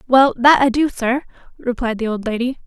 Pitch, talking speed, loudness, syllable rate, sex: 250 Hz, 205 wpm, -17 LUFS, 5.2 syllables/s, female